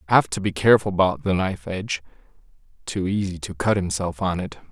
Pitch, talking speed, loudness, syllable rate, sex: 95 Hz, 190 wpm, -23 LUFS, 6.1 syllables/s, male